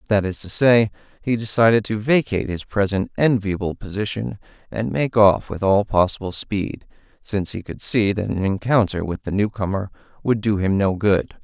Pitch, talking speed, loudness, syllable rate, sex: 105 Hz, 180 wpm, -20 LUFS, 5.1 syllables/s, male